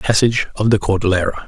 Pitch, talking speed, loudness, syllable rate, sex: 100 Hz, 165 wpm, -17 LUFS, 6.7 syllables/s, male